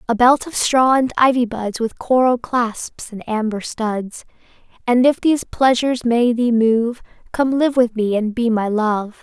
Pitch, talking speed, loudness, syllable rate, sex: 235 Hz, 180 wpm, -17 LUFS, 4.2 syllables/s, female